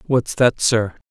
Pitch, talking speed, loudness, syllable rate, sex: 120 Hz, 165 wpm, -18 LUFS, 3.6 syllables/s, male